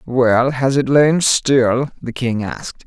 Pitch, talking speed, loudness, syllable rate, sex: 130 Hz, 170 wpm, -16 LUFS, 3.4 syllables/s, male